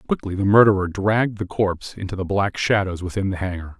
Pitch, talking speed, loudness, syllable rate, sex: 95 Hz, 205 wpm, -21 LUFS, 6.1 syllables/s, male